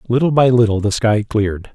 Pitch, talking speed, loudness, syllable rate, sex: 115 Hz, 205 wpm, -15 LUFS, 5.7 syllables/s, male